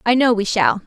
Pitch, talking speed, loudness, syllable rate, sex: 230 Hz, 280 wpm, -17 LUFS, 5.5 syllables/s, female